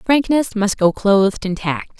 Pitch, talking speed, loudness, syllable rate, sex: 210 Hz, 180 wpm, -17 LUFS, 4.4 syllables/s, female